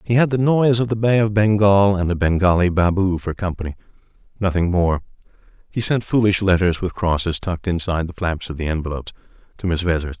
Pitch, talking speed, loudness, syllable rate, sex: 95 Hz, 195 wpm, -19 LUFS, 6.1 syllables/s, male